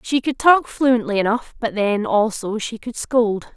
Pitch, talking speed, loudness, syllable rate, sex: 230 Hz, 185 wpm, -19 LUFS, 4.1 syllables/s, female